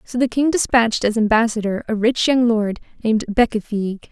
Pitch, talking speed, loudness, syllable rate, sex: 225 Hz, 175 wpm, -18 LUFS, 5.7 syllables/s, female